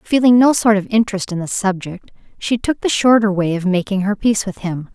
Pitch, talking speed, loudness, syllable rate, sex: 205 Hz, 230 wpm, -16 LUFS, 5.6 syllables/s, female